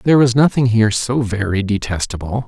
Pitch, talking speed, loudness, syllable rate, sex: 115 Hz, 170 wpm, -16 LUFS, 5.8 syllables/s, male